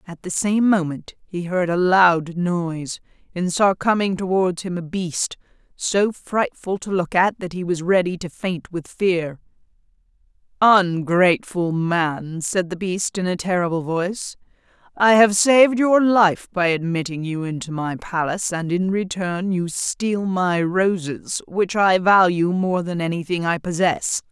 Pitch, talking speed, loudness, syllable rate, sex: 180 Hz, 160 wpm, -20 LUFS, 4.1 syllables/s, female